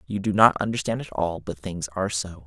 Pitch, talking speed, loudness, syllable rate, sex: 95 Hz, 220 wpm, -24 LUFS, 5.6 syllables/s, male